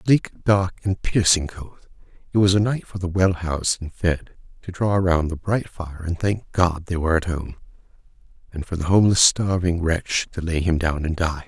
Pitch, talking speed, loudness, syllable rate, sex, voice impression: 90 Hz, 210 wpm, -21 LUFS, 4.9 syllables/s, male, masculine, middle-aged, relaxed, slightly weak, muffled, raspy, intellectual, calm, mature, slightly reassuring, wild, modest